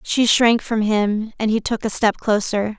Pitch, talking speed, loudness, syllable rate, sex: 220 Hz, 215 wpm, -18 LUFS, 4.2 syllables/s, female